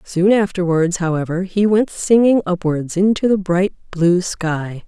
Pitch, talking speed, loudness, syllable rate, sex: 185 Hz, 150 wpm, -17 LUFS, 4.2 syllables/s, female